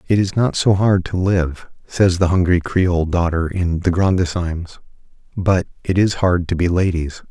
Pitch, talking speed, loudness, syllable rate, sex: 90 Hz, 180 wpm, -18 LUFS, 4.6 syllables/s, male